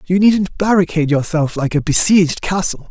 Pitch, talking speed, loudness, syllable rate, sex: 170 Hz, 165 wpm, -15 LUFS, 5.3 syllables/s, male